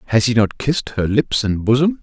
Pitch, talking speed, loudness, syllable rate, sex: 120 Hz, 240 wpm, -17 LUFS, 5.7 syllables/s, male